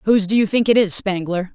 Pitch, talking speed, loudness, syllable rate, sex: 200 Hz, 270 wpm, -17 LUFS, 6.4 syllables/s, female